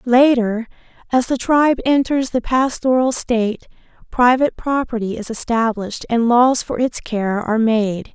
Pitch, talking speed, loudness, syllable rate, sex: 240 Hz, 140 wpm, -17 LUFS, 4.7 syllables/s, female